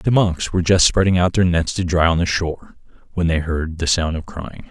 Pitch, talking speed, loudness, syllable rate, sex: 85 Hz, 255 wpm, -18 LUFS, 5.4 syllables/s, male